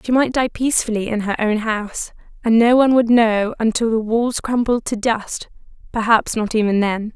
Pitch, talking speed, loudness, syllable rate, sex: 225 Hz, 185 wpm, -18 LUFS, 5.1 syllables/s, female